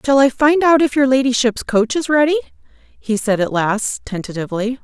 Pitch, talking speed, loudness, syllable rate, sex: 250 Hz, 185 wpm, -16 LUFS, 5.2 syllables/s, female